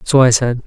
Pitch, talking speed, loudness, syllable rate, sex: 125 Hz, 270 wpm, -13 LUFS, 5.5 syllables/s, male